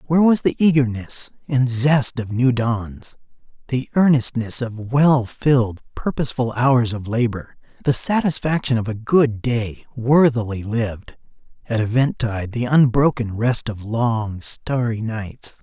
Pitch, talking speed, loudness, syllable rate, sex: 120 Hz, 135 wpm, -19 LUFS, 4.2 syllables/s, male